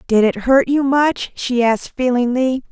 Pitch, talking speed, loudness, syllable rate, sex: 255 Hz, 175 wpm, -16 LUFS, 4.4 syllables/s, female